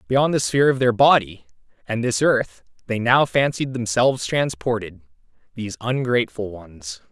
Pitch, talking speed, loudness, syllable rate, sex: 115 Hz, 145 wpm, -20 LUFS, 4.9 syllables/s, male